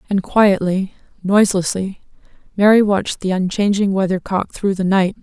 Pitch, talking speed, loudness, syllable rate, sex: 195 Hz, 140 wpm, -17 LUFS, 5.0 syllables/s, female